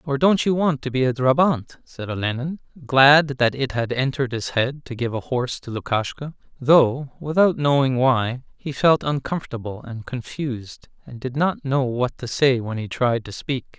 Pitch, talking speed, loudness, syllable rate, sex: 130 Hz, 190 wpm, -21 LUFS, 4.7 syllables/s, male